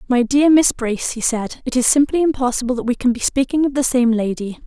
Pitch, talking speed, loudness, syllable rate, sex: 250 Hz, 245 wpm, -17 LUFS, 5.9 syllables/s, female